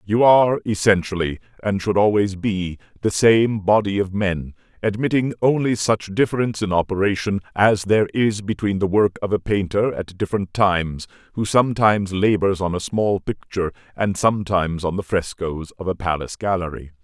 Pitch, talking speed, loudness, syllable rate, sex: 100 Hz, 160 wpm, -20 LUFS, 5.3 syllables/s, male